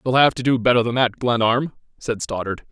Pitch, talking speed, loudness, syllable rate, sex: 120 Hz, 220 wpm, -20 LUFS, 5.6 syllables/s, male